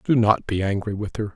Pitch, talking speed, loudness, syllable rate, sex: 105 Hz, 265 wpm, -23 LUFS, 5.6 syllables/s, male